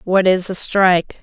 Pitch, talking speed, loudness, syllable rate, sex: 185 Hz, 195 wpm, -16 LUFS, 4.6 syllables/s, female